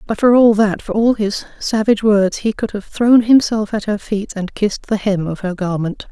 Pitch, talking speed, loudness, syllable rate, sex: 210 Hz, 225 wpm, -16 LUFS, 5.0 syllables/s, female